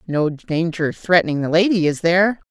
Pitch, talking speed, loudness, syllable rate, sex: 170 Hz, 165 wpm, -18 LUFS, 5.2 syllables/s, female